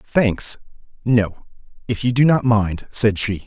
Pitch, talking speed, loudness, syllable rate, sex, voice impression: 115 Hz, 140 wpm, -18 LUFS, 3.6 syllables/s, male, masculine, middle-aged, tensed, powerful, hard, muffled, cool, calm, mature, wild, lively, slightly kind